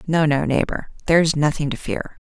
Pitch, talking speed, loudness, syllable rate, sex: 155 Hz, 185 wpm, -20 LUFS, 5.3 syllables/s, female